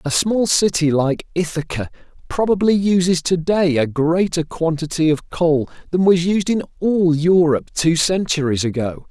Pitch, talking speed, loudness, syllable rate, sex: 165 Hz, 150 wpm, -18 LUFS, 4.6 syllables/s, male